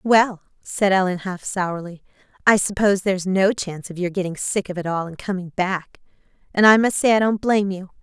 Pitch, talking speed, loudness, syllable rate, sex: 190 Hz, 210 wpm, -20 LUFS, 5.5 syllables/s, female